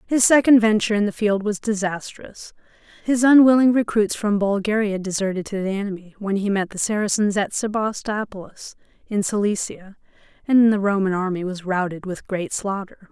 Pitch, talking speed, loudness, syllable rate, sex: 205 Hz, 160 wpm, -20 LUFS, 5.2 syllables/s, female